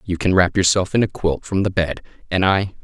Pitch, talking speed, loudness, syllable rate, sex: 90 Hz, 255 wpm, -19 LUFS, 5.4 syllables/s, male